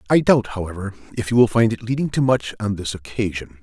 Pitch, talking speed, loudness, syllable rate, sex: 110 Hz, 230 wpm, -20 LUFS, 6.0 syllables/s, male